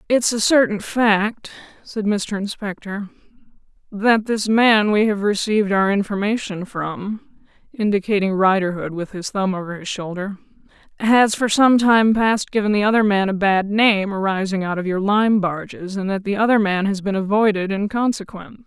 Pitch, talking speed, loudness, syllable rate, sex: 205 Hz, 165 wpm, -19 LUFS, 4.8 syllables/s, female